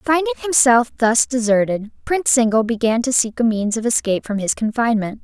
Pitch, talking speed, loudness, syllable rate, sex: 235 Hz, 185 wpm, -17 LUFS, 5.9 syllables/s, female